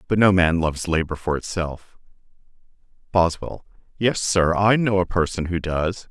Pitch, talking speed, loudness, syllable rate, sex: 90 Hz, 155 wpm, -21 LUFS, 4.7 syllables/s, male